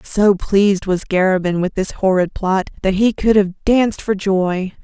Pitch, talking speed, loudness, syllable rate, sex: 195 Hz, 185 wpm, -16 LUFS, 4.5 syllables/s, female